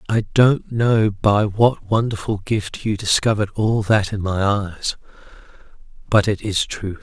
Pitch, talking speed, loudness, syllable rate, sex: 105 Hz, 145 wpm, -19 LUFS, 4.0 syllables/s, male